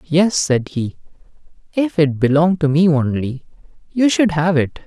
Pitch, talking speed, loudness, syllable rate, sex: 160 Hz, 160 wpm, -17 LUFS, 4.6 syllables/s, male